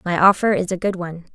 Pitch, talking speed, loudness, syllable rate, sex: 185 Hz, 265 wpm, -19 LUFS, 6.9 syllables/s, female